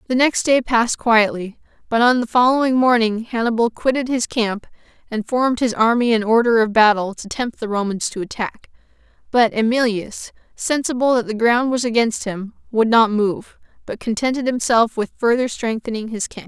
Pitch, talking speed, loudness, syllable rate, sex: 230 Hz, 175 wpm, -18 LUFS, 5.1 syllables/s, female